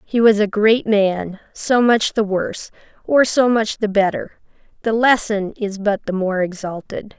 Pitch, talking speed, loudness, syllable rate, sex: 210 Hz, 175 wpm, -18 LUFS, 4.2 syllables/s, female